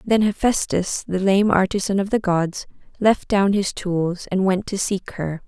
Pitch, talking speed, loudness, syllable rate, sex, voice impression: 195 Hz, 185 wpm, -20 LUFS, 4.4 syllables/s, female, feminine, adult-like, tensed, slightly powerful, bright, soft, fluent, intellectual, calm, reassuring, kind, modest